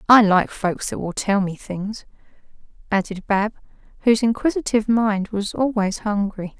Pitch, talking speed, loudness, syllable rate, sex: 210 Hz, 145 wpm, -21 LUFS, 4.7 syllables/s, female